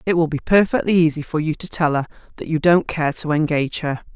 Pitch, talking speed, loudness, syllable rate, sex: 160 Hz, 245 wpm, -19 LUFS, 6.2 syllables/s, female